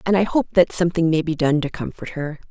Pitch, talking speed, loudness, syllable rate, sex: 165 Hz, 265 wpm, -20 LUFS, 6.4 syllables/s, female